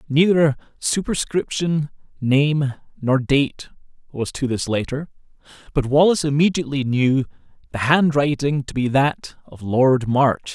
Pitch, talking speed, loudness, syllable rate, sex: 140 Hz, 120 wpm, -20 LUFS, 4.2 syllables/s, male